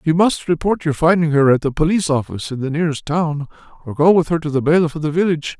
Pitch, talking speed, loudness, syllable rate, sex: 155 Hz, 260 wpm, -17 LUFS, 6.9 syllables/s, male